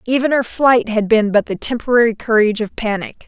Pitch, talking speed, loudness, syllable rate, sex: 225 Hz, 200 wpm, -16 LUFS, 5.8 syllables/s, female